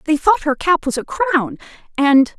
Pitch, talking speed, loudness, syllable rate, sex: 305 Hz, 200 wpm, -16 LUFS, 4.4 syllables/s, female